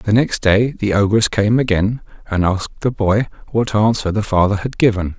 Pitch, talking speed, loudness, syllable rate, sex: 105 Hz, 195 wpm, -17 LUFS, 4.9 syllables/s, male